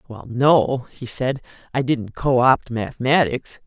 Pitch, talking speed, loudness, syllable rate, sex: 130 Hz, 145 wpm, -20 LUFS, 3.9 syllables/s, female